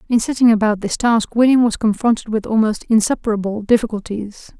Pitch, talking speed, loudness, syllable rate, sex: 220 Hz, 155 wpm, -17 LUFS, 5.8 syllables/s, female